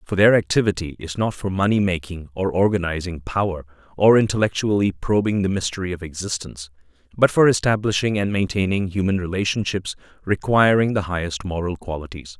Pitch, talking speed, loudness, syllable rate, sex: 95 Hz, 145 wpm, -21 LUFS, 5.8 syllables/s, male